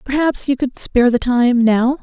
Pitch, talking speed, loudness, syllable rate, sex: 255 Hz, 210 wpm, -16 LUFS, 4.7 syllables/s, female